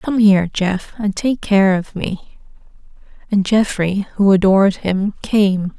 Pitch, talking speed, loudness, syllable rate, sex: 200 Hz, 145 wpm, -16 LUFS, 3.8 syllables/s, female